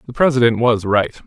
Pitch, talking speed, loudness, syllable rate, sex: 120 Hz, 190 wpm, -16 LUFS, 5.5 syllables/s, male